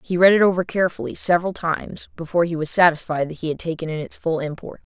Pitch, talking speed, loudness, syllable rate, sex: 165 Hz, 235 wpm, -21 LUFS, 6.8 syllables/s, female